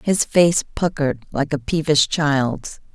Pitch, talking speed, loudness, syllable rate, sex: 145 Hz, 145 wpm, -19 LUFS, 3.9 syllables/s, female